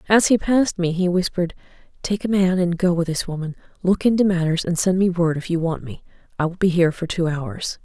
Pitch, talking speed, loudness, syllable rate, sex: 180 Hz, 245 wpm, -20 LUFS, 5.9 syllables/s, female